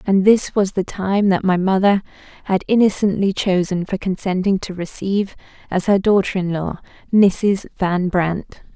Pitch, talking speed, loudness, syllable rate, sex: 190 Hz, 160 wpm, -18 LUFS, 4.5 syllables/s, female